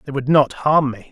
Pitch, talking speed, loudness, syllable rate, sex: 140 Hz, 270 wpm, -17 LUFS, 5.2 syllables/s, male